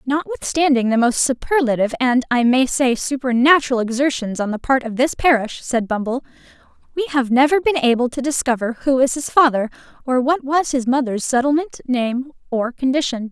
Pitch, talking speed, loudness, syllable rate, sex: 260 Hz, 170 wpm, -18 LUFS, 5.3 syllables/s, female